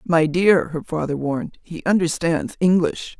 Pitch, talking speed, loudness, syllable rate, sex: 165 Hz, 150 wpm, -20 LUFS, 4.4 syllables/s, female